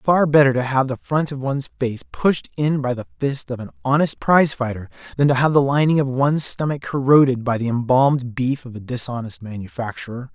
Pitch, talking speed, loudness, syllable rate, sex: 130 Hz, 210 wpm, -20 LUFS, 5.7 syllables/s, male